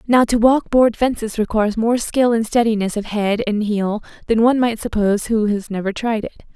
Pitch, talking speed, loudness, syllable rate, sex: 220 Hz, 210 wpm, -18 LUFS, 5.4 syllables/s, female